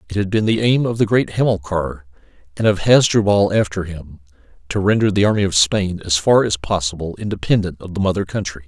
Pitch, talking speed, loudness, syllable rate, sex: 95 Hz, 200 wpm, -17 LUFS, 5.8 syllables/s, male